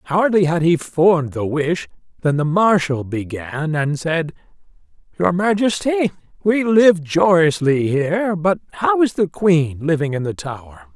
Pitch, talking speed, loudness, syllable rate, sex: 165 Hz, 150 wpm, -18 LUFS, 4.2 syllables/s, male